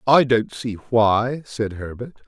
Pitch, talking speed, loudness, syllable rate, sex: 115 Hz, 160 wpm, -20 LUFS, 3.5 syllables/s, male